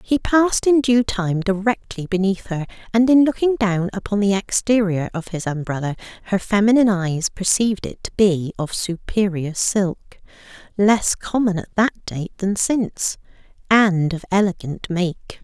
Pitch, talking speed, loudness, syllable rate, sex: 200 Hz, 145 wpm, -19 LUFS, 4.6 syllables/s, female